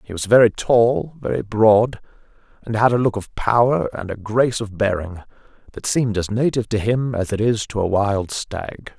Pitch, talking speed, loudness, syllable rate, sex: 110 Hz, 200 wpm, -19 LUFS, 5.0 syllables/s, male